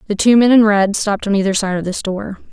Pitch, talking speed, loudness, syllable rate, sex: 205 Hz, 285 wpm, -15 LUFS, 6.2 syllables/s, female